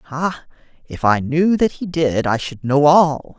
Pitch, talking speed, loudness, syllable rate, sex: 150 Hz, 195 wpm, -17 LUFS, 4.0 syllables/s, male